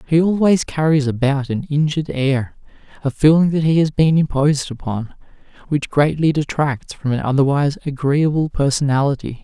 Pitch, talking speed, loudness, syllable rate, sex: 145 Hz, 145 wpm, -18 LUFS, 5.2 syllables/s, male